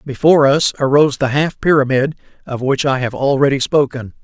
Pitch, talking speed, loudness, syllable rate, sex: 140 Hz, 170 wpm, -15 LUFS, 5.7 syllables/s, male